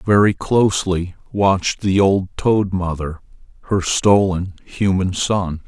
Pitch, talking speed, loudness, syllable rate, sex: 95 Hz, 115 wpm, -18 LUFS, 3.8 syllables/s, male